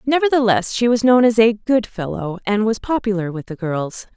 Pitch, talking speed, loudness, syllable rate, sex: 220 Hz, 200 wpm, -18 LUFS, 5.1 syllables/s, female